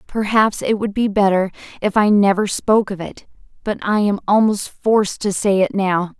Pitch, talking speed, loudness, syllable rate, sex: 200 Hz, 195 wpm, -17 LUFS, 4.9 syllables/s, female